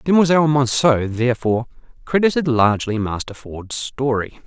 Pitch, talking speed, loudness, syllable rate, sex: 130 Hz, 105 wpm, -18 LUFS, 5.3 syllables/s, male